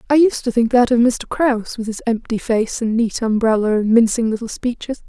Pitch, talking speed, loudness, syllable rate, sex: 235 Hz, 225 wpm, -17 LUFS, 5.4 syllables/s, female